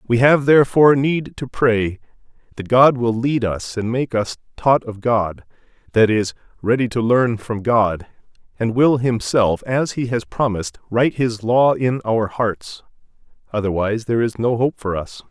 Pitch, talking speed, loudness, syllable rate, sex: 115 Hz, 170 wpm, -18 LUFS, 4.6 syllables/s, male